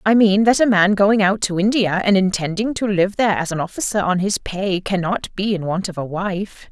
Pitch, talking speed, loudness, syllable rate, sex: 195 Hz, 240 wpm, -18 LUFS, 5.2 syllables/s, female